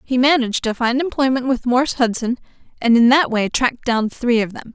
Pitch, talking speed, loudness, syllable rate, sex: 245 Hz, 215 wpm, -17 LUFS, 5.7 syllables/s, female